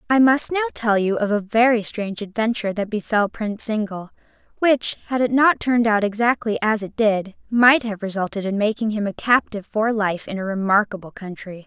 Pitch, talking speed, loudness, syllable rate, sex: 215 Hz, 195 wpm, -20 LUFS, 5.5 syllables/s, female